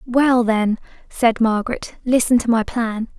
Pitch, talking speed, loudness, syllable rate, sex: 235 Hz, 150 wpm, -18 LUFS, 4.2 syllables/s, female